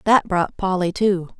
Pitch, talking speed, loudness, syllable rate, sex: 190 Hz, 170 wpm, -20 LUFS, 4.4 syllables/s, female